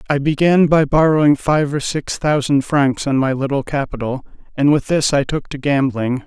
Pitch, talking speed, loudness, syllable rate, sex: 140 Hz, 190 wpm, -17 LUFS, 4.9 syllables/s, male